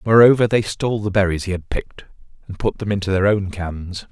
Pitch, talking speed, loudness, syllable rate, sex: 100 Hz, 220 wpm, -19 LUFS, 5.9 syllables/s, male